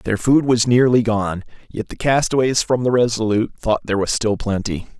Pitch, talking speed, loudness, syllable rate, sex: 115 Hz, 190 wpm, -18 LUFS, 5.3 syllables/s, male